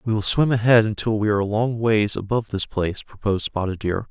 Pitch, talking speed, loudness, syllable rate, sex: 105 Hz, 235 wpm, -21 LUFS, 6.3 syllables/s, male